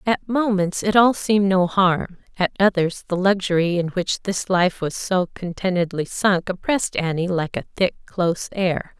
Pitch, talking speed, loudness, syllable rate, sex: 185 Hz, 175 wpm, -21 LUFS, 4.6 syllables/s, female